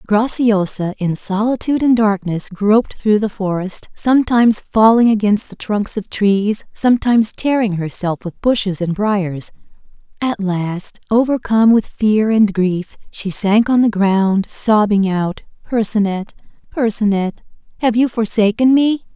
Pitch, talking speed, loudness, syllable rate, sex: 210 Hz, 135 wpm, -16 LUFS, 4.3 syllables/s, female